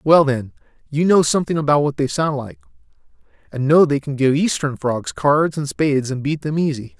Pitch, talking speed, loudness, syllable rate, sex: 145 Hz, 205 wpm, -18 LUFS, 5.4 syllables/s, male